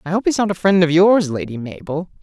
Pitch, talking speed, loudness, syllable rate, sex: 180 Hz, 270 wpm, -17 LUFS, 5.9 syllables/s, female